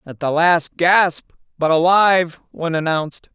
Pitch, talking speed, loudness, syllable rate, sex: 165 Hz, 145 wpm, -17 LUFS, 4.7 syllables/s, female